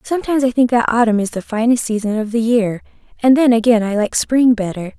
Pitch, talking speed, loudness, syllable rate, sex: 230 Hz, 230 wpm, -16 LUFS, 6.1 syllables/s, female